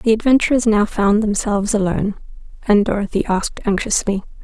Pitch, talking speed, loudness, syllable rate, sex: 210 Hz, 135 wpm, -17 LUFS, 5.9 syllables/s, female